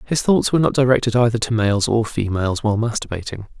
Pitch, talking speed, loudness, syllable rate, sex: 115 Hz, 200 wpm, -18 LUFS, 6.5 syllables/s, male